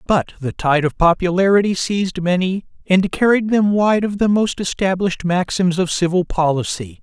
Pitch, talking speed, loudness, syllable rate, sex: 185 Hz, 160 wpm, -17 LUFS, 5.1 syllables/s, male